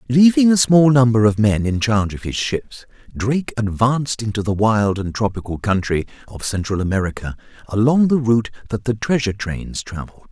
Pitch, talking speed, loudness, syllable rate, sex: 115 Hz, 175 wpm, -18 LUFS, 5.5 syllables/s, male